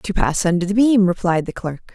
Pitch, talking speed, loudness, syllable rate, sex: 190 Hz, 245 wpm, -18 LUFS, 5.2 syllables/s, female